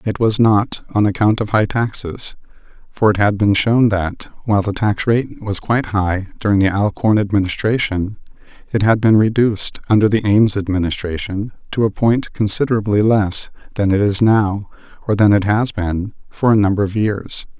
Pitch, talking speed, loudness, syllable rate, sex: 105 Hz, 175 wpm, -16 LUFS, 5.0 syllables/s, male